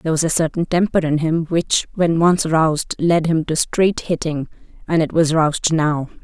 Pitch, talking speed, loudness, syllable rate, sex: 160 Hz, 200 wpm, -18 LUFS, 4.8 syllables/s, female